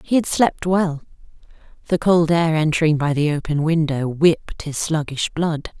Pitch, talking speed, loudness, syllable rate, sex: 160 Hz, 165 wpm, -19 LUFS, 4.6 syllables/s, female